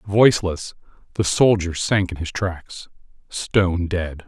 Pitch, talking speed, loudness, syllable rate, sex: 90 Hz, 110 wpm, -20 LUFS, 4.0 syllables/s, male